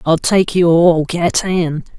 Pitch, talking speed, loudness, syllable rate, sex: 170 Hz, 180 wpm, -14 LUFS, 3.4 syllables/s, male